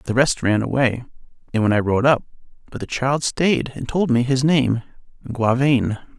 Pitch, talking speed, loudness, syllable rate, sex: 125 Hz, 165 wpm, -19 LUFS, 4.4 syllables/s, male